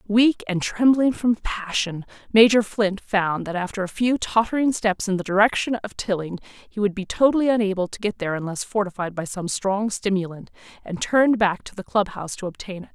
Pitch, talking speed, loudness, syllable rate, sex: 205 Hz, 200 wpm, -22 LUFS, 5.4 syllables/s, female